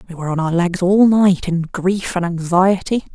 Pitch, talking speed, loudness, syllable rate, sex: 180 Hz, 210 wpm, -16 LUFS, 4.8 syllables/s, female